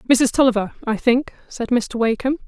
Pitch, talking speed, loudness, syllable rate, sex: 240 Hz, 170 wpm, -19 LUFS, 5.5 syllables/s, female